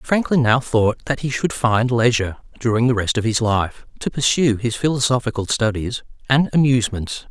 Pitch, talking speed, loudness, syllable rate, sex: 120 Hz, 170 wpm, -19 LUFS, 5.2 syllables/s, male